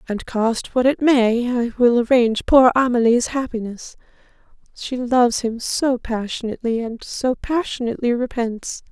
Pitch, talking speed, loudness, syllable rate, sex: 240 Hz, 135 wpm, -19 LUFS, 4.6 syllables/s, female